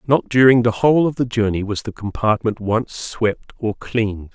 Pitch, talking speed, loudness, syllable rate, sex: 110 Hz, 195 wpm, -19 LUFS, 4.8 syllables/s, male